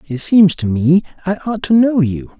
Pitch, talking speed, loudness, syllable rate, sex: 175 Hz, 225 wpm, -14 LUFS, 4.5 syllables/s, male